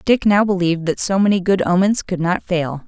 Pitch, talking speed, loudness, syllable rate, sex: 185 Hz, 230 wpm, -17 LUFS, 5.4 syllables/s, female